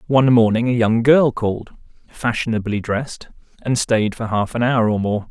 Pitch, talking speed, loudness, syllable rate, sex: 115 Hz, 180 wpm, -18 LUFS, 5.2 syllables/s, male